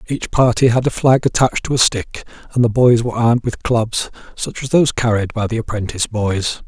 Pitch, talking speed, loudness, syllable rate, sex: 115 Hz, 215 wpm, -16 LUFS, 5.7 syllables/s, male